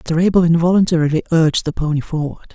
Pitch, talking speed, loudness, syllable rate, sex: 160 Hz, 165 wpm, -16 LUFS, 6.8 syllables/s, male